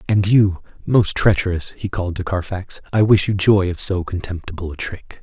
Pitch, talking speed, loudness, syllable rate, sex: 95 Hz, 195 wpm, -19 LUFS, 5.1 syllables/s, male